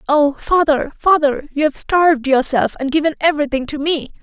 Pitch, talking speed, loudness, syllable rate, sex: 295 Hz, 185 wpm, -16 LUFS, 5.3 syllables/s, female